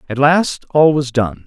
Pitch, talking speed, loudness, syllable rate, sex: 135 Hz, 205 wpm, -15 LUFS, 4.0 syllables/s, male